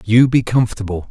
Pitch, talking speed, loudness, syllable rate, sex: 110 Hz, 165 wpm, -16 LUFS, 6.1 syllables/s, male